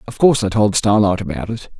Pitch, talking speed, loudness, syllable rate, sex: 105 Hz, 235 wpm, -16 LUFS, 6.4 syllables/s, male